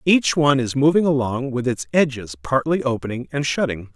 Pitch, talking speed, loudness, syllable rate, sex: 135 Hz, 180 wpm, -20 LUFS, 5.4 syllables/s, male